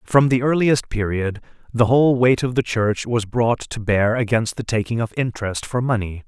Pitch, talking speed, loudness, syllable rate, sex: 115 Hz, 200 wpm, -20 LUFS, 4.9 syllables/s, male